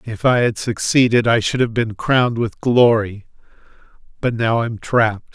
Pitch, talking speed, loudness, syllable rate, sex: 115 Hz, 170 wpm, -17 LUFS, 4.7 syllables/s, male